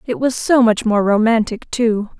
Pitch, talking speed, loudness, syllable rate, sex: 225 Hz, 190 wpm, -16 LUFS, 4.5 syllables/s, female